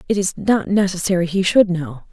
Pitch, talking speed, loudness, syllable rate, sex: 185 Hz, 200 wpm, -18 LUFS, 5.4 syllables/s, female